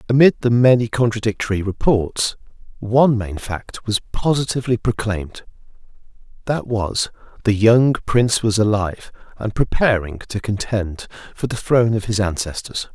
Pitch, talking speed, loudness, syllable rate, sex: 110 Hz, 125 wpm, -19 LUFS, 4.9 syllables/s, male